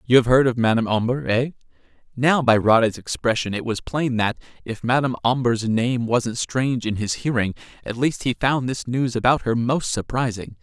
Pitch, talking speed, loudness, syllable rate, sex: 120 Hz, 190 wpm, -21 LUFS, 5.2 syllables/s, male